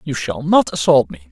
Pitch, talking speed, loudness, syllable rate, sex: 125 Hz, 230 wpm, -16 LUFS, 5.4 syllables/s, male